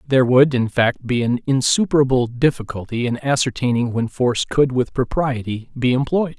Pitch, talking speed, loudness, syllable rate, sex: 130 Hz, 160 wpm, -19 LUFS, 5.2 syllables/s, male